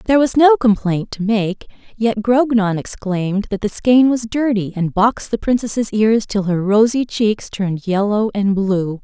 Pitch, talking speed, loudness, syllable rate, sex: 215 Hz, 180 wpm, -17 LUFS, 4.5 syllables/s, female